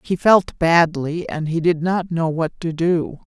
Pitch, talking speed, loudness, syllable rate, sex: 165 Hz, 200 wpm, -19 LUFS, 3.8 syllables/s, female